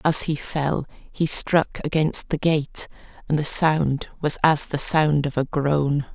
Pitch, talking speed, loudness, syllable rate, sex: 150 Hz, 175 wpm, -21 LUFS, 3.6 syllables/s, female